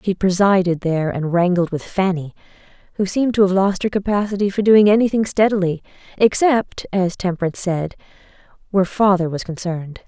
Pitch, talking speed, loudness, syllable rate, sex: 190 Hz, 155 wpm, -18 LUFS, 5.7 syllables/s, female